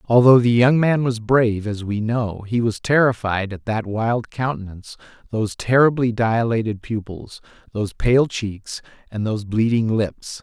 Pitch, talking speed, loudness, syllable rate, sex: 115 Hz, 155 wpm, -20 LUFS, 4.6 syllables/s, male